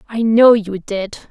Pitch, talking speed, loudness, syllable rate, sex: 215 Hz, 185 wpm, -14 LUFS, 3.5 syllables/s, female